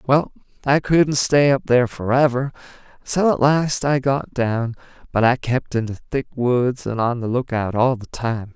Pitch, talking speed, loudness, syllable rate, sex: 125 Hz, 190 wpm, -20 LUFS, 4.5 syllables/s, male